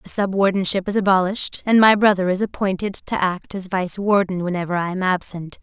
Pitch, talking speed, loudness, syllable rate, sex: 190 Hz, 205 wpm, -19 LUFS, 5.6 syllables/s, female